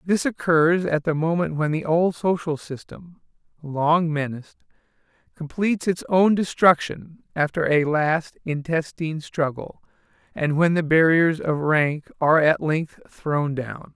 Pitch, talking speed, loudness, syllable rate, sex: 160 Hz, 140 wpm, -22 LUFS, 4.2 syllables/s, male